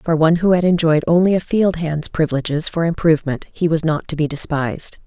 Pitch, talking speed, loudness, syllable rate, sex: 160 Hz, 215 wpm, -17 LUFS, 6.0 syllables/s, female